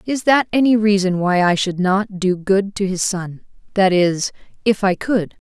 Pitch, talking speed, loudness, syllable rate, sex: 195 Hz, 185 wpm, -18 LUFS, 4.4 syllables/s, female